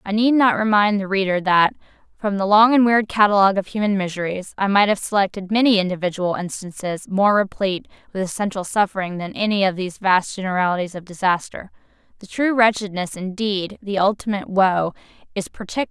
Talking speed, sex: 170 wpm, female